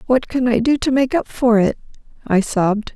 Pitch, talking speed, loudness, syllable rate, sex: 240 Hz, 225 wpm, -17 LUFS, 5.2 syllables/s, female